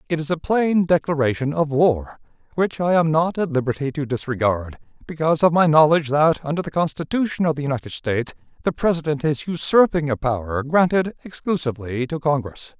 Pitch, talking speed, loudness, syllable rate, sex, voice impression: 150 Hz, 175 wpm, -20 LUFS, 5.8 syllables/s, male, masculine, adult-like, fluent, cool, slightly refreshing, sincere